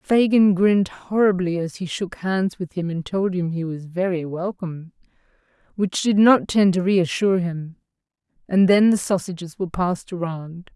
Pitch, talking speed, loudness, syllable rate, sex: 185 Hz, 165 wpm, -21 LUFS, 4.8 syllables/s, female